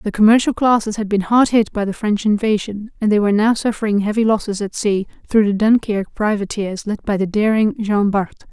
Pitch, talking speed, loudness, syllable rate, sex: 210 Hz, 210 wpm, -17 LUFS, 5.6 syllables/s, female